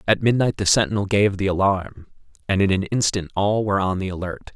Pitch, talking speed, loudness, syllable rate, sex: 100 Hz, 210 wpm, -21 LUFS, 6.0 syllables/s, male